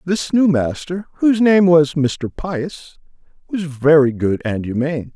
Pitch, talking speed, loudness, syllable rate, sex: 155 Hz, 150 wpm, -17 LUFS, 4.1 syllables/s, male